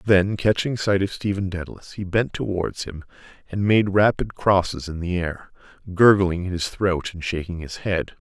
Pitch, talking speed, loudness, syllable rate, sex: 95 Hz, 180 wpm, -22 LUFS, 4.8 syllables/s, male